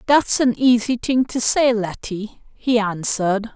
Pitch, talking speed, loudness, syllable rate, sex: 230 Hz, 150 wpm, -19 LUFS, 4.0 syllables/s, female